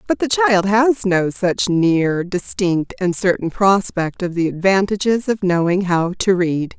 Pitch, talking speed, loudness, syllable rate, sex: 190 Hz, 170 wpm, -17 LUFS, 4.0 syllables/s, female